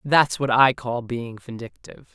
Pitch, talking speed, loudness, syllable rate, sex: 125 Hz, 170 wpm, -21 LUFS, 4.4 syllables/s, male